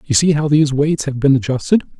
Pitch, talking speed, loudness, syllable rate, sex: 140 Hz, 240 wpm, -15 LUFS, 6.3 syllables/s, male